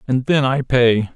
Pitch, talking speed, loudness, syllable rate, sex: 125 Hz, 210 wpm, -16 LUFS, 4.1 syllables/s, male